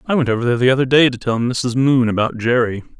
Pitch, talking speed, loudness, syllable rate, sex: 125 Hz, 260 wpm, -16 LUFS, 6.3 syllables/s, male